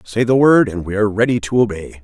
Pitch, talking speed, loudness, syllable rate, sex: 110 Hz, 265 wpm, -15 LUFS, 6.2 syllables/s, male